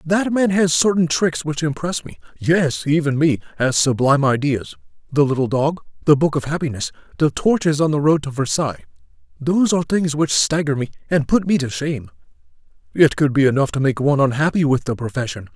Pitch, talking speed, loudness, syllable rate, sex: 145 Hz, 185 wpm, -18 LUFS, 5.7 syllables/s, male